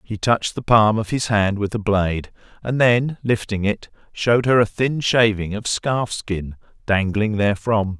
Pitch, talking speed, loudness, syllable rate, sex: 105 Hz, 180 wpm, -20 LUFS, 4.5 syllables/s, male